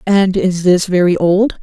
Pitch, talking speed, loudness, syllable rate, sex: 185 Hz, 185 wpm, -13 LUFS, 4.0 syllables/s, female